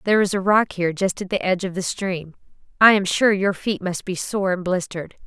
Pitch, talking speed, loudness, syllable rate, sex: 190 Hz, 250 wpm, -21 LUFS, 5.9 syllables/s, female